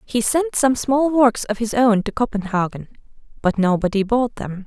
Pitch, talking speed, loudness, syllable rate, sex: 225 Hz, 180 wpm, -19 LUFS, 4.6 syllables/s, female